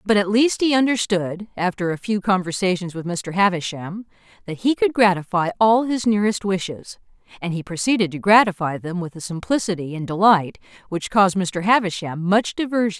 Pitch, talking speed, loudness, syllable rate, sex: 195 Hz, 170 wpm, -20 LUFS, 5.4 syllables/s, female